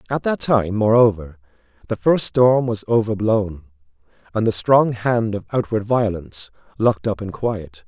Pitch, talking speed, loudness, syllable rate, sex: 105 Hz, 150 wpm, -19 LUFS, 4.6 syllables/s, male